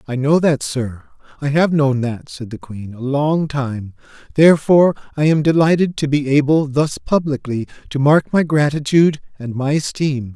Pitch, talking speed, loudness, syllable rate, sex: 145 Hz, 175 wpm, -17 LUFS, 4.8 syllables/s, male